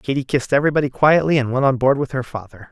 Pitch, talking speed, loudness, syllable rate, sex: 135 Hz, 245 wpm, -18 LUFS, 7.1 syllables/s, male